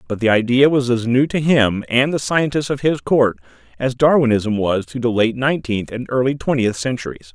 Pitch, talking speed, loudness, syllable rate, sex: 125 Hz, 205 wpm, -17 LUFS, 5.2 syllables/s, male